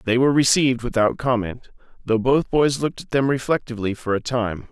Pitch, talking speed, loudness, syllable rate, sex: 125 Hz, 190 wpm, -20 LUFS, 5.9 syllables/s, male